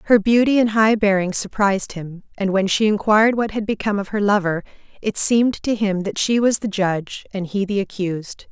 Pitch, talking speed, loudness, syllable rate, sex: 205 Hz, 210 wpm, -19 LUFS, 5.6 syllables/s, female